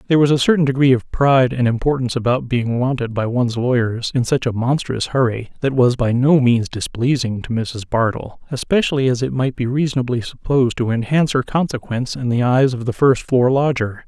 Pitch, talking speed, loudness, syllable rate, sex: 125 Hz, 205 wpm, -18 LUFS, 5.8 syllables/s, male